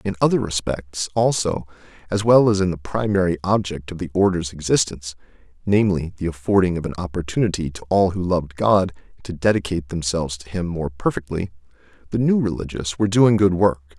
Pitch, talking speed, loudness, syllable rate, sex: 90 Hz, 170 wpm, -21 LUFS, 4.3 syllables/s, male